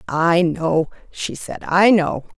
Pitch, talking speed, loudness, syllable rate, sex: 170 Hz, 150 wpm, -18 LUFS, 3.2 syllables/s, female